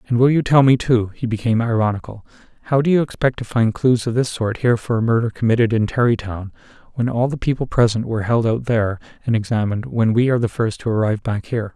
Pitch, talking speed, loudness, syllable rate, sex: 115 Hz, 225 wpm, -19 LUFS, 6.7 syllables/s, male